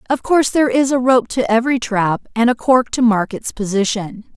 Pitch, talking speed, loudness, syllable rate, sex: 235 Hz, 220 wpm, -16 LUFS, 5.5 syllables/s, female